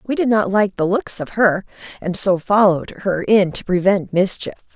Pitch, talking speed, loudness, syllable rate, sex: 195 Hz, 200 wpm, -17 LUFS, 4.9 syllables/s, female